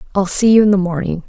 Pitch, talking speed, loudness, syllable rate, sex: 195 Hz, 280 wpm, -14 LUFS, 7.2 syllables/s, female